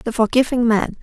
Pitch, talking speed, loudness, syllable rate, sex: 230 Hz, 175 wpm, -17 LUFS, 5.3 syllables/s, female